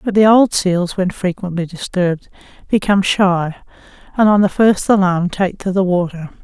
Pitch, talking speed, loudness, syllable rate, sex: 185 Hz, 170 wpm, -15 LUFS, 5.0 syllables/s, female